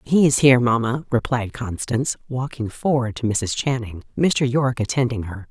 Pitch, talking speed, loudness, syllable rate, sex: 125 Hz, 165 wpm, -21 LUFS, 5.1 syllables/s, female